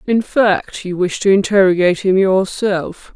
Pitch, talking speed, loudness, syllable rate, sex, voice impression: 195 Hz, 150 wpm, -15 LUFS, 4.3 syllables/s, female, feminine, adult-like, slightly tensed, slightly powerful, bright, soft, slightly muffled, intellectual, calm, friendly, reassuring, lively, kind